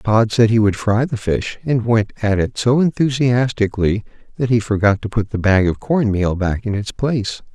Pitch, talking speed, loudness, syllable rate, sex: 110 Hz, 215 wpm, -18 LUFS, 5.0 syllables/s, male